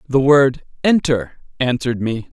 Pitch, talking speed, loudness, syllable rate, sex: 135 Hz, 125 wpm, -17 LUFS, 4.4 syllables/s, male